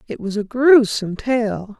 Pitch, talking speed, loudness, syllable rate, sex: 225 Hz, 165 wpm, -18 LUFS, 4.3 syllables/s, female